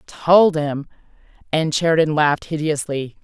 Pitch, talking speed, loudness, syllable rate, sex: 155 Hz, 110 wpm, -18 LUFS, 4.6 syllables/s, female